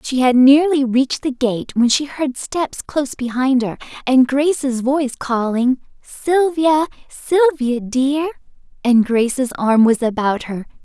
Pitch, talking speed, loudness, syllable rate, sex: 265 Hz, 145 wpm, -17 LUFS, 4.1 syllables/s, female